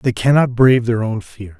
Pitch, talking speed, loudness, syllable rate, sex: 115 Hz, 225 wpm, -15 LUFS, 5.2 syllables/s, male